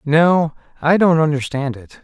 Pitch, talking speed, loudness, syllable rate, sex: 155 Hz, 145 wpm, -17 LUFS, 4.2 syllables/s, male